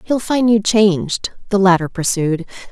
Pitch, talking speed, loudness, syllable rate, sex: 195 Hz, 155 wpm, -16 LUFS, 4.5 syllables/s, female